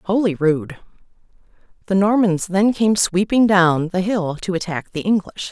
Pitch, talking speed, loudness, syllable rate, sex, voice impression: 190 Hz, 150 wpm, -18 LUFS, 4.3 syllables/s, female, very feminine, middle-aged, thin, slightly tensed, slightly powerful, bright, hard, very clear, very fluent, cool, very intellectual, refreshing, sincere, very calm, slightly friendly, reassuring, unique, very elegant, sweet, lively, strict, slightly intense, sharp